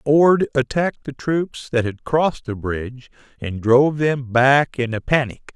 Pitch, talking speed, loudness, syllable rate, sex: 130 Hz, 175 wpm, -19 LUFS, 4.3 syllables/s, male